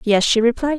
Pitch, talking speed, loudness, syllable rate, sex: 240 Hz, 230 wpm, -16 LUFS, 5.8 syllables/s, female